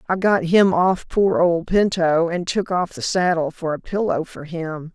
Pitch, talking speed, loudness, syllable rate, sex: 175 Hz, 205 wpm, -20 LUFS, 4.2 syllables/s, female